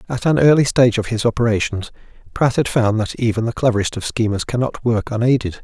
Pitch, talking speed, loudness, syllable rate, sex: 115 Hz, 200 wpm, -18 LUFS, 6.2 syllables/s, male